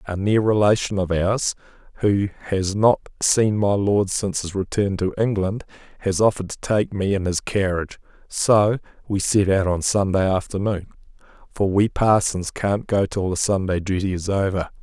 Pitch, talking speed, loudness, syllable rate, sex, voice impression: 100 Hz, 170 wpm, -21 LUFS, 4.8 syllables/s, male, masculine, adult-like, slightly bright, fluent, cool, sincere, calm, slightly mature, friendly, wild, slightly kind, slightly modest